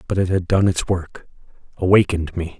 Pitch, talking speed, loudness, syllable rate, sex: 90 Hz, 160 wpm, -19 LUFS, 5.7 syllables/s, male